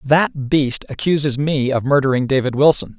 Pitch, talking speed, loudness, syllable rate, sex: 140 Hz, 160 wpm, -17 LUFS, 5.0 syllables/s, male